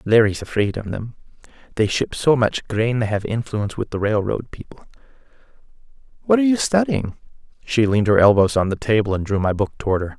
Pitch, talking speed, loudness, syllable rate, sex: 110 Hz, 195 wpm, -19 LUFS, 6.0 syllables/s, male